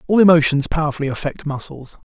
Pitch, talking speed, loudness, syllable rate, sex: 150 Hz, 140 wpm, -17 LUFS, 6.5 syllables/s, male